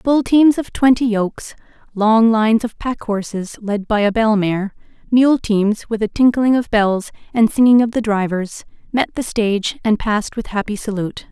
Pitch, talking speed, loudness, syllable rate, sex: 220 Hz, 185 wpm, -17 LUFS, 4.7 syllables/s, female